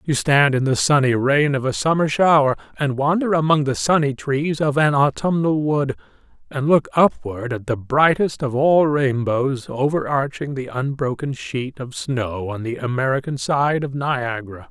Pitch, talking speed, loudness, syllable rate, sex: 140 Hz, 165 wpm, -19 LUFS, 4.5 syllables/s, male